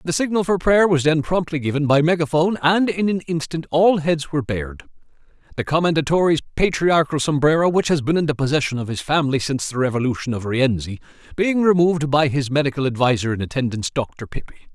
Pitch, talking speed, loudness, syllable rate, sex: 150 Hz, 185 wpm, -19 LUFS, 6.3 syllables/s, male